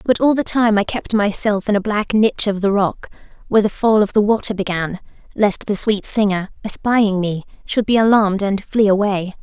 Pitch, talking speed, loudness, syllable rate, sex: 205 Hz, 210 wpm, -17 LUFS, 5.3 syllables/s, female